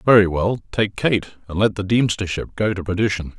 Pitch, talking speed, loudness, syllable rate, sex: 100 Hz, 195 wpm, -20 LUFS, 5.4 syllables/s, male